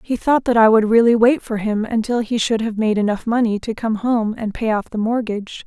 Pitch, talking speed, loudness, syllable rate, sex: 225 Hz, 255 wpm, -18 LUFS, 5.4 syllables/s, female